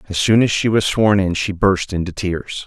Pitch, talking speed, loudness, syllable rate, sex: 95 Hz, 245 wpm, -17 LUFS, 4.8 syllables/s, male